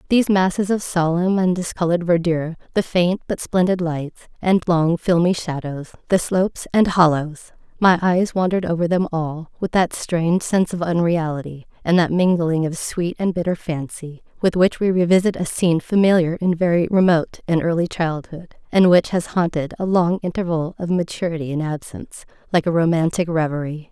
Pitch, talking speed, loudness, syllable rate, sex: 170 Hz, 170 wpm, -19 LUFS, 5.3 syllables/s, female